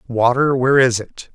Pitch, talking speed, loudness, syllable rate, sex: 125 Hz, 180 wpm, -16 LUFS, 5.0 syllables/s, male